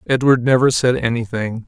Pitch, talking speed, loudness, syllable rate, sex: 120 Hz, 145 wpm, -16 LUFS, 5.2 syllables/s, male